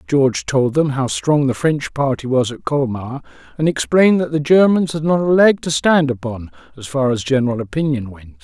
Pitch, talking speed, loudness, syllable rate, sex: 135 Hz, 205 wpm, -17 LUFS, 5.3 syllables/s, male